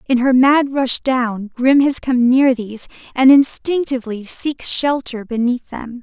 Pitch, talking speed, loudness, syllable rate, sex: 255 Hz, 160 wpm, -16 LUFS, 4.1 syllables/s, female